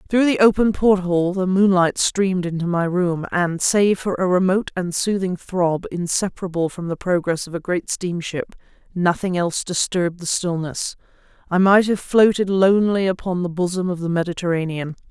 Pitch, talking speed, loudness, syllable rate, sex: 180 Hz, 165 wpm, -20 LUFS, 5.2 syllables/s, female